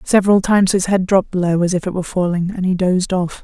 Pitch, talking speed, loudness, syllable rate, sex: 185 Hz, 260 wpm, -16 LUFS, 6.7 syllables/s, female